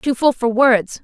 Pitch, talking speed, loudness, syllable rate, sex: 245 Hz, 235 wpm, -15 LUFS, 4.0 syllables/s, female